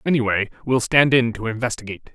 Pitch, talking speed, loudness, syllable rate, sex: 120 Hz, 170 wpm, -20 LUFS, 6.5 syllables/s, male